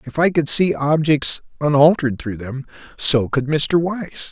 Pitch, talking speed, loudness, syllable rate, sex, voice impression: 145 Hz, 165 wpm, -17 LUFS, 4.3 syllables/s, male, masculine, middle-aged, slightly thick, slightly refreshing, slightly friendly, slightly kind